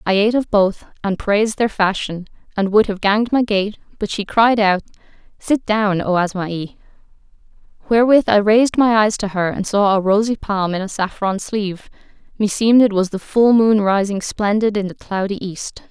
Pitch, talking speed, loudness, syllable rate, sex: 205 Hz, 190 wpm, -17 LUFS, 5.3 syllables/s, female